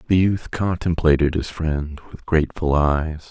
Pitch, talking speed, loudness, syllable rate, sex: 80 Hz, 145 wpm, -21 LUFS, 4.2 syllables/s, male